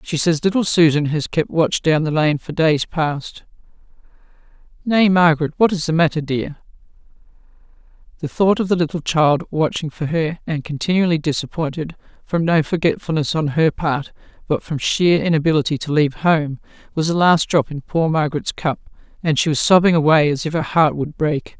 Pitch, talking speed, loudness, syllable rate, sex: 160 Hz, 170 wpm, -18 LUFS, 5.3 syllables/s, female